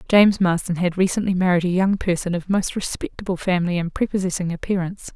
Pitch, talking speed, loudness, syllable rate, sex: 185 Hz, 175 wpm, -21 LUFS, 6.4 syllables/s, female